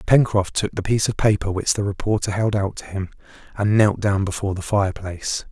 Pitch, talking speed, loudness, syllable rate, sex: 100 Hz, 205 wpm, -21 LUFS, 5.9 syllables/s, male